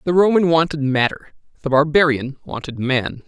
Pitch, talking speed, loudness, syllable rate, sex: 145 Hz, 145 wpm, -18 LUFS, 5.1 syllables/s, male